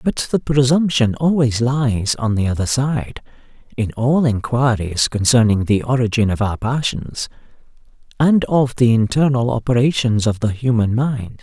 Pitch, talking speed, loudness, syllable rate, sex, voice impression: 120 Hz, 140 wpm, -17 LUFS, 4.5 syllables/s, male, very masculine, slightly young, very adult-like, very thick, slightly relaxed, powerful, bright, very soft, muffled, fluent, cool, very intellectual, very sincere, very calm, very mature, friendly, very reassuring, very unique, very elegant, slightly wild, very sweet, slightly lively, very kind, very modest, slightly light